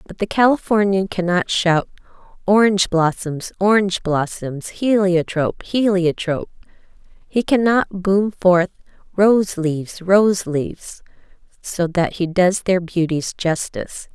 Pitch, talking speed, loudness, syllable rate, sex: 185 Hz, 100 wpm, -18 LUFS, 4.4 syllables/s, female